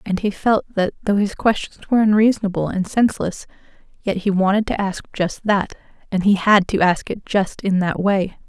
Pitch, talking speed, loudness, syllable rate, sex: 195 Hz, 200 wpm, -19 LUFS, 5.2 syllables/s, female